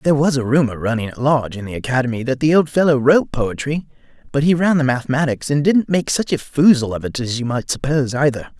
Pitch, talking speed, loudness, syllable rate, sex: 135 Hz, 235 wpm, -17 LUFS, 6.3 syllables/s, male